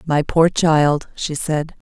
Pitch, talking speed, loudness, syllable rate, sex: 155 Hz, 155 wpm, -18 LUFS, 3.1 syllables/s, female